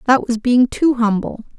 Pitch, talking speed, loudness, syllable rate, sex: 240 Hz, 190 wpm, -16 LUFS, 4.6 syllables/s, female